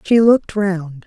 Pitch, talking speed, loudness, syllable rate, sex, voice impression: 190 Hz, 170 wpm, -16 LUFS, 4.1 syllables/s, female, very feminine, very middle-aged, old, very thin, very relaxed, weak, slightly bright, very soft, very clear, fluent, slightly raspy, slightly cute, cool, very intellectual, refreshing, sincere, very calm, very friendly, very reassuring, unique, very elegant, slightly sweet, very kind, modest, light